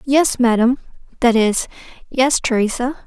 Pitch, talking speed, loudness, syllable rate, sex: 245 Hz, 100 wpm, -17 LUFS, 5.0 syllables/s, female